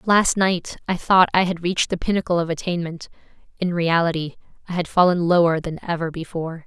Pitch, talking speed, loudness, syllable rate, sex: 170 Hz, 180 wpm, -21 LUFS, 5.8 syllables/s, female